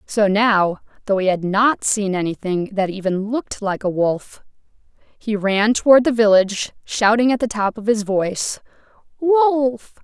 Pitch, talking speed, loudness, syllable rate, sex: 215 Hz, 160 wpm, -18 LUFS, 4.3 syllables/s, female